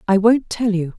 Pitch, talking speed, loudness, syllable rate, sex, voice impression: 205 Hz, 245 wpm, -17 LUFS, 5.0 syllables/s, female, feminine, middle-aged, tensed, slightly powerful, hard, slightly raspy, intellectual, calm, reassuring, elegant, slightly strict